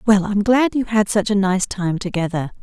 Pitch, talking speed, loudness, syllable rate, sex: 200 Hz, 230 wpm, -18 LUFS, 5.0 syllables/s, female